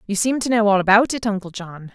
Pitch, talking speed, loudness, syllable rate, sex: 210 Hz, 275 wpm, -18 LUFS, 6.2 syllables/s, female